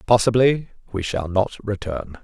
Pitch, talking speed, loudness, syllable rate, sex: 105 Hz, 135 wpm, -21 LUFS, 4.3 syllables/s, male